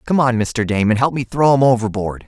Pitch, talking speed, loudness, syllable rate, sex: 120 Hz, 235 wpm, -16 LUFS, 5.6 syllables/s, male